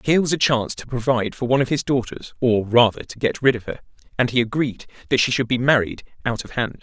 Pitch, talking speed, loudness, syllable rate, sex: 125 Hz, 255 wpm, -20 LUFS, 6.5 syllables/s, male